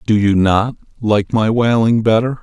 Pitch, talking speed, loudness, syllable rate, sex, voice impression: 110 Hz, 175 wpm, -15 LUFS, 4.4 syllables/s, male, masculine, middle-aged, tensed, slightly weak, slightly dark, slightly soft, slightly muffled, halting, cool, calm, mature, reassuring, wild, kind, modest